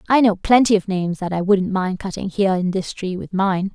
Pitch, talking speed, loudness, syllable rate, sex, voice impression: 190 Hz, 255 wpm, -19 LUFS, 5.6 syllables/s, female, feminine, slightly young, slightly tensed, slightly cute, friendly, slightly kind